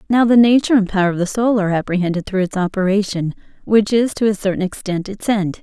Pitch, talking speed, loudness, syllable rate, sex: 200 Hz, 225 wpm, -17 LUFS, 6.4 syllables/s, female